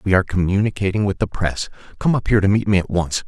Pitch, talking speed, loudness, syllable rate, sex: 100 Hz, 240 wpm, -19 LUFS, 6.6 syllables/s, male